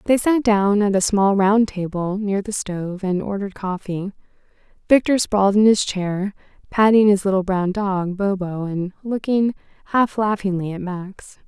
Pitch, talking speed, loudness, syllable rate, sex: 200 Hz, 160 wpm, -20 LUFS, 4.6 syllables/s, female